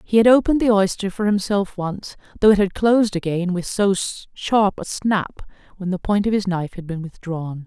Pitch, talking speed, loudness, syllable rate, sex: 195 Hz, 210 wpm, -20 LUFS, 5.4 syllables/s, female